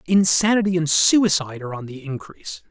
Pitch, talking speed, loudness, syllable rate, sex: 165 Hz, 155 wpm, -18 LUFS, 5.9 syllables/s, male